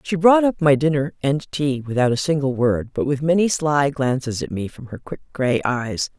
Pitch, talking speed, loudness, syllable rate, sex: 140 Hz, 225 wpm, -20 LUFS, 4.8 syllables/s, female